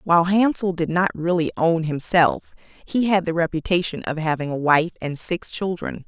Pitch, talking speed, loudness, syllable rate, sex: 170 Hz, 180 wpm, -21 LUFS, 5.0 syllables/s, female